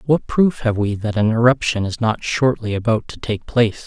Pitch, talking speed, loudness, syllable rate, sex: 115 Hz, 215 wpm, -18 LUFS, 5.1 syllables/s, male